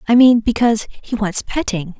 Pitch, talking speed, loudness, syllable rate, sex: 220 Hz, 180 wpm, -16 LUFS, 5.1 syllables/s, female